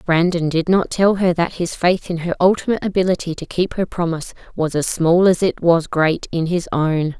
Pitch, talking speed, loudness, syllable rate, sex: 170 Hz, 215 wpm, -18 LUFS, 5.2 syllables/s, female